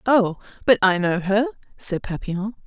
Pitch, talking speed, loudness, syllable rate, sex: 205 Hz, 160 wpm, -22 LUFS, 5.0 syllables/s, female